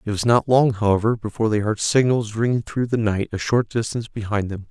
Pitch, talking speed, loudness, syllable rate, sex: 110 Hz, 230 wpm, -21 LUFS, 5.9 syllables/s, male